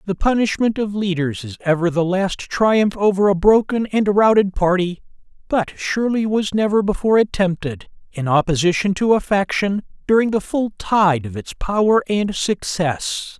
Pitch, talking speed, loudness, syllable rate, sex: 195 Hz, 155 wpm, -18 LUFS, 4.7 syllables/s, male